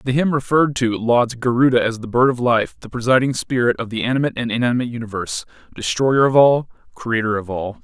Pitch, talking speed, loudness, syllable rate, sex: 120 Hz, 200 wpm, -18 LUFS, 6.4 syllables/s, male